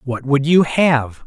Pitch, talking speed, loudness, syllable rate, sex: 145 Hz, 190 wpm, -16 LUFS, 3.5 syllables/s, male